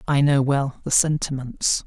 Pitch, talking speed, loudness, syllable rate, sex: 140 Hz, 160 wpm, -21 LUFS, 4.2 syllables/s, male